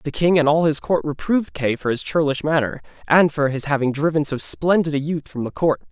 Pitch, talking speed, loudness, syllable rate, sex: 150 Hz, 245 wpm, -20 LUFS, 5.7 syllables/s, male